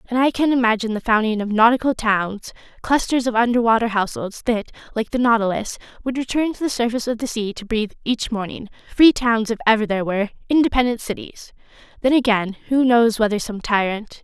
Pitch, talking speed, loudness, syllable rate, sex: 230 Hz, 185 wpm, -19 LUFS, 6.0 syllables/s, female